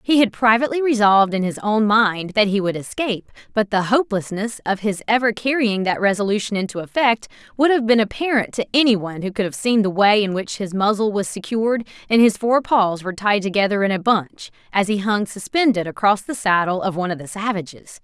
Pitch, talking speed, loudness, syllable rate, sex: 210 Hz, 215 wpm, -19 LUFS, 5.8 syllables/s, female